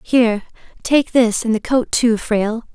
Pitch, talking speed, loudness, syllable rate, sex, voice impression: 230 Hz, 175 wpm, -17 LUFS, 4.4 syllables/s, female, feminine, slightly young, tensed, slightly hard, clear, fluent, intellectual, unique, sharp